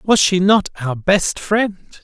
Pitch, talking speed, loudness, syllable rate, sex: 190 Hz, 175 wpm, -16 LUFS, 3.2 syllables/s, male